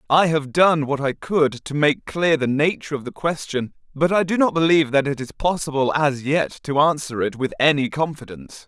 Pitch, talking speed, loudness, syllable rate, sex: 145 Hz, 215 wpm, -20 LUFS, 5.3 syllables/s, male